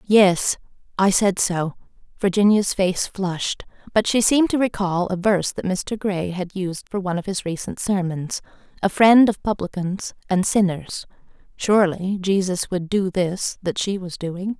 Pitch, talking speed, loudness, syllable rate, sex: 190 Hz, 165 wpm, -21 LUFS, 4.5 syllables/s, female